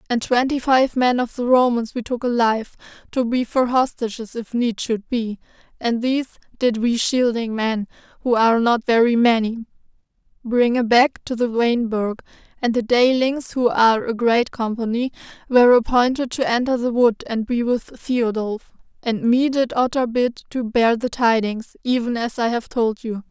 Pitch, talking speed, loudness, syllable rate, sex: 235 Hz, 175 wpm, -20 LUFS, 4.7 syllables/s, female